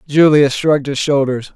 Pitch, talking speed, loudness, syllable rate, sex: 140 Hz, 155 wpm, -14 LUFS, 4.9 syllables/s, male